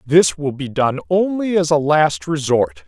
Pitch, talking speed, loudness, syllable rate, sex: 145 Hz, 190 wpm, -17 LUFS, 4.2 syllables/s, male